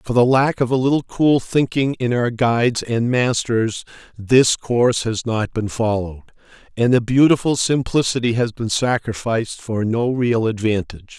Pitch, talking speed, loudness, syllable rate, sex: 120 Hz, 160 wpm, -18 LUFS, 4.7 syllables/s, male